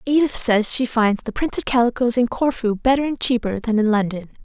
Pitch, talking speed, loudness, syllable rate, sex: 235 Hz, 205 wpm, -19 LUFS, 5.5 syllables/s, female